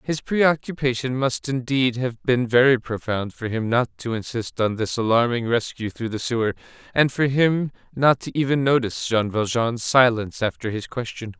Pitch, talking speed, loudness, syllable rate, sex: 125 Hz, 175 wpm, -22 LUFS, 4.9 syllables/s, male